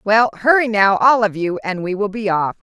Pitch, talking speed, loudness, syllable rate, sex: 210 Hz, 220 wpm, -16 LUFS, 5.2 syllables/s, female